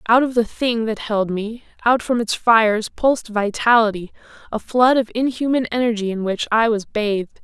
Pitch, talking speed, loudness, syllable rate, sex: 225 Hz, 180 wpm, -19 LUFS, 5.0 syllables/s, female